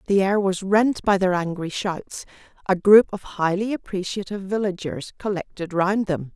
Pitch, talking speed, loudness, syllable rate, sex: 190 Hz, 160 wpm, -22 LUFS, 4.8 syllables/s, female